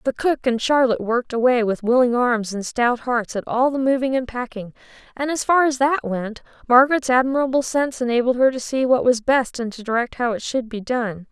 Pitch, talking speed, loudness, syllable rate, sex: 245 Hz, 225 wpm, -20 LUFS, 5.5 syllables/s, female